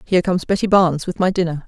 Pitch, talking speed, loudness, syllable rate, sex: 180 Hz, 250 wpm, -18 LUFS, 7.6 syllables/s, female